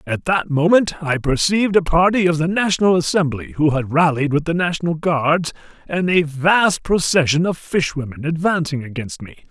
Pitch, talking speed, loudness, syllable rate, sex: 160 Hz, 170 wpm, -18 LUFS, 5.1 syllables/s, male